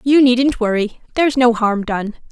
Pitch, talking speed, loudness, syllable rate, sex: 240 Hz, 155 wpm, -16 LUFS, 4.5 syllables/s, female